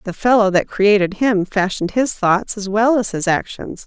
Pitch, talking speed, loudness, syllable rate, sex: 205 Hz, 200 wpm, -17 LUFS, 4.8 syllables/s, female